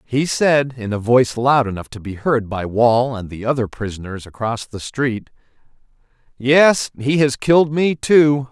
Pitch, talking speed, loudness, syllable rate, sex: 125 Hz, 175 wpm, -17 LUFS, 4.4 syllables/s, male